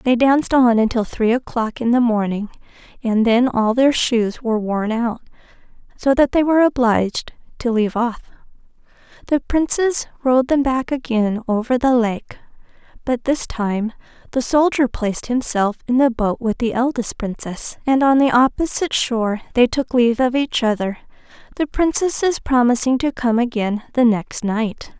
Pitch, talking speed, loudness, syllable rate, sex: 240 Hz, 165 wpm, -18 LUFS, 4.0 syllables/s, female